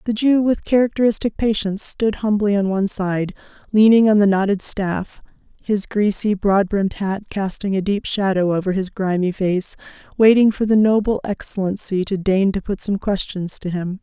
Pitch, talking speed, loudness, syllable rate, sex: 200 Hz, 175 wpm, -19 LUFS, 5.0 syllables/s, female